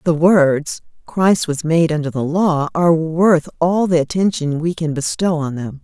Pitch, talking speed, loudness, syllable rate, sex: 160 Hz, 185 wpm, -16 LUFS, 4.3 syllables/s, female